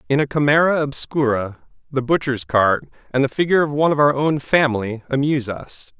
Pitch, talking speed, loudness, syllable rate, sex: 135 Hz, 180 wpm, -19 LUFS, 5.6 syllables/s, male